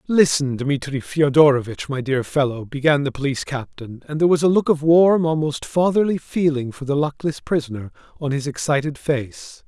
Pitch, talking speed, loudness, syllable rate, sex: 145 Hz, 175 wpm, -20 LUFS, 5.2 syllables/s, male